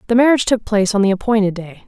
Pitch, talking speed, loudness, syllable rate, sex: 210 Hz, 255 wpm, -16 LUFS, 7.8 syllables/s, female